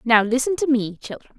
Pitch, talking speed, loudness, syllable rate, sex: 245 Hz, 215 wpm, -20 LUFS, 5.5 syllables/s, female